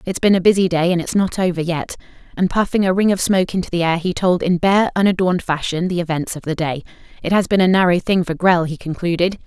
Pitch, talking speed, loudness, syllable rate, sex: 180 Hz, 255 wpm, -17 LUFS, 6.3 syllables/s, female